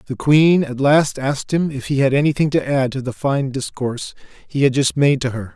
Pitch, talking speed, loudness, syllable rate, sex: 135 Hz, 240 wpm, -18 LUFS, 5.3 syllables/s, male